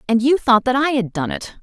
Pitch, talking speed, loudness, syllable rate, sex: 245 Hz, 295 wpm, -17 LUFS, 5.6 syllables/s, female